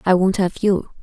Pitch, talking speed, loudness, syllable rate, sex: 190 Hz, 235 wpm, -19 LUFS, 5.1 syllables/s, female